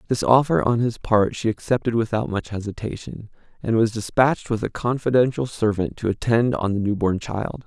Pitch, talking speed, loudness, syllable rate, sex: 110 Hz, 190 wpm, -22 LUFS, 5.3 syllables/s, male